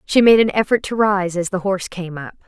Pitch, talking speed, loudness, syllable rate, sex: 195 Hz, 265 wpm, -17 LUFS, 5.9 syllables/s, female